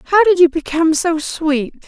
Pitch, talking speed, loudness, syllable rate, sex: 325 Hz, 190 wpm, -15 LUFS, 4.6 syllables/s, female